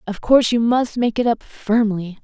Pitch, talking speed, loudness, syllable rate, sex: 225 Hz, 215 wpm, -18 LUFS, 4.9 syllables/s, female